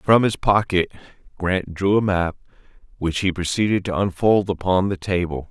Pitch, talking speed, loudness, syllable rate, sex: 95 Hz, 165 wpm, -21 LUFS, 4.9 syllables/s, male